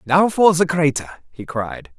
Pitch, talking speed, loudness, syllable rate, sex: 155 Hz, 180 wpm, -18 LUFS, 4.4 syllables/s, male